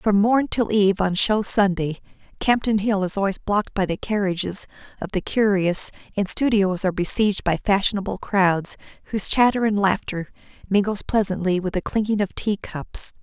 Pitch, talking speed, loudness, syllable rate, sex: 200 Hz, 170 wpm, -21 LUFS, 5.2 syllables/s, female